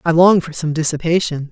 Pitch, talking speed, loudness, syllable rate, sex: 160 Hz, 200 wpm, -16 LUFS, 5.7 syllables/s, male